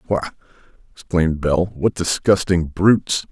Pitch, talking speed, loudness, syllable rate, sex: 90 Hz, 110 wpm, -18 LUFS, 4.6 syllables/s, male